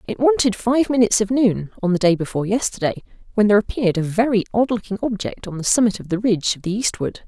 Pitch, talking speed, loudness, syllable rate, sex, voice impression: 210 Hz, 230 wpm, -19 LUFS, 6.7 syllables/s, female, feminine, adult-like, fluent, intellectual, slightly strict